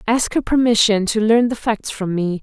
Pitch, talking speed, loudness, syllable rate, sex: 220 Hz, 225 wpm, -17 LUFS, 4.8 syllables/s, female